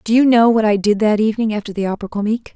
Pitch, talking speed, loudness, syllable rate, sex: 215 Hz, 280 wpm, -16 LUFS, 7.8 syllables/s, female